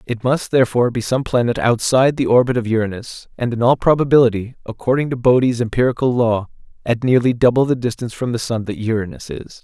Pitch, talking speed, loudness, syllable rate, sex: 120 Hz, 195 wpm, -17 LUFS, 6.2 syllables/s, male